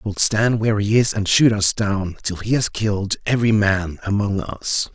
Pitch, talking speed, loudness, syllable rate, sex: 105 Hz, 220 wpm, -19 LUFS, 5.0 syllables/s, male